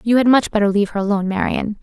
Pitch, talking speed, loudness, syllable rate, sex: 210 Hz, 265 wpm, -17 LUFS, 7.6 syllables/s, female